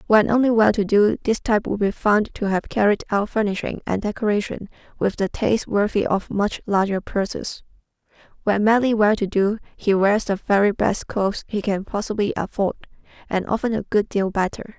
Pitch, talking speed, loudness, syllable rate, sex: 205 Hz, 185 wpm, -21 LUFS, 5.4 syllables/s, female